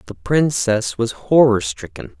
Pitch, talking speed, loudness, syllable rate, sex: 120 Hz, 135 wpm, -17 LUFS, 4.0 syllables/s, male